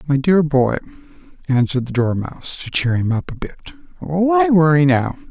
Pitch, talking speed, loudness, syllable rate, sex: 155 Hz, 170 wpm, -17 LUFS, 5.2 syllables/s, male